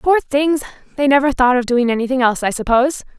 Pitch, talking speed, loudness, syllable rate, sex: 265 Hz, 205 wpm, -16 LUFS, 6.3 syllables/s, female